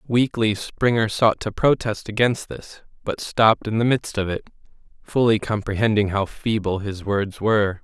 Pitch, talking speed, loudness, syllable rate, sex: 110 Hz, 160 wpm, -21 LUFS, 4.6 syllables/s, male